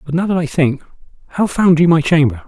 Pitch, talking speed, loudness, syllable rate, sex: 155 Hz, 240 wpm, -14 LUFS, 6.1 syllables/s, male